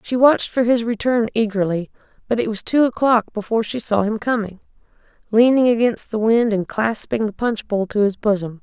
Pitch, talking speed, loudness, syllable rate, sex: 220 Hz, 195 wpm, -19 LUFS, 5.4 syllables/s, female